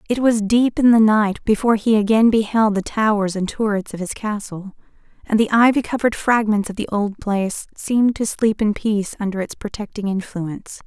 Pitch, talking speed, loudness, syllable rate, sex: 215 Hz, 195 wpm, -19 LUFS, 5.4 syllables/s, female